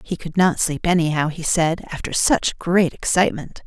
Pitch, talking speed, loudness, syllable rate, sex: 170 Hz, 180 wpm, -19 LUFS, 4.8 syllables/s, female